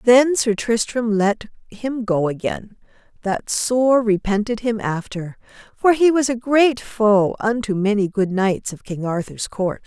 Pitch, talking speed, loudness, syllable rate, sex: 220 Hz, 160 wpm, -19 LUFS, 3.9 syllables/s, female